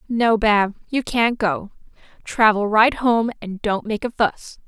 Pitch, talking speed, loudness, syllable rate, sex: 220 Hz, 165 wpm, -19 LUFS, 3.7 syllables/s, female